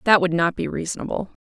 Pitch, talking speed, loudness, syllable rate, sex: 180 Hz, 210 wpm, -22 LUFS, 6.6 syllables/s, female